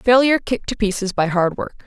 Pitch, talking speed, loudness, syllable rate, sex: 215 Hz, 225 wpm, -19 LUFS, 6.1 syllables/s, female